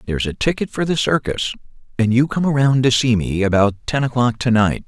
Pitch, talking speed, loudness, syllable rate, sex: 120 Hz, 220 wpm, -18 LUFS, 5.6 syllables/s, male